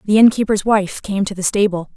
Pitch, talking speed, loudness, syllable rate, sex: 200 Hz, 245 wpm, -16 LUFS, 5.7 syllables/s, female